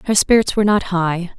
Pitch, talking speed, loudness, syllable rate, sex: 190 Hz, 215 wpm, -16 LUFS, 6.1 syllables/s, female